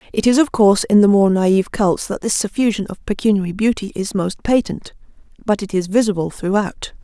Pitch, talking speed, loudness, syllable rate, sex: 205 Hz, 195 wpm, -17 LUFS, 5.7 syllables/s, female